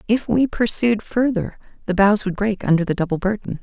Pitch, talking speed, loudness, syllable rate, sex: 205 Hz, 200 wpm, -19 LUFS, 5.3 syllables/s, female